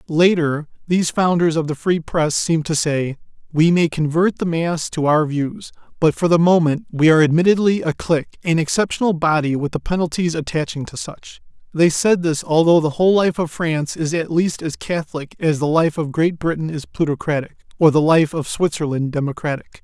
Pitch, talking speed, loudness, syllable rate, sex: 160 Hz, 195 wpm, -18 LUFS, 5.4 syllables/s, male